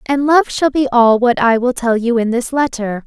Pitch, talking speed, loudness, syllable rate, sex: 245 Hz, 255 wpm, -14 LUFS, 4.7 syllables/s, female